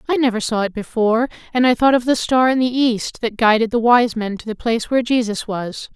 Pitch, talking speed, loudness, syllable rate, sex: 230 Hz, 250 wpm, -18 LUFS, 5.8 syllables/s, female